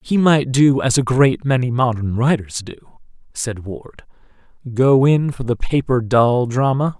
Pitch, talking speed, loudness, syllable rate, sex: 125 Hz, 165 wpm, -17 LUFS, 4.1 syllables/s, male